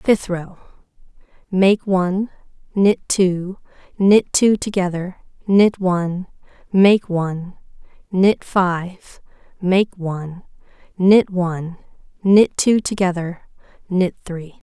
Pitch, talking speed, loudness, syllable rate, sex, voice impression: 185 Hz, 95 wpm, -18 LUFS, 3.5 syllables/s, female, feminine, adult-like, tensed, bright, clear, fluent, slightly nasal, intellectual, friendly, lively, slightly intense, light